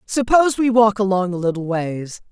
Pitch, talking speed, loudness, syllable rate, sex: 205 Hz, 180 wpm, -18 LUFS, 5.2 syllables/s, female